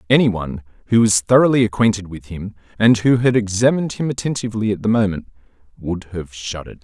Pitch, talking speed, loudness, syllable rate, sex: 105 Hz, 175 wpm, -18 LUFS, 6.4 syllables/s, male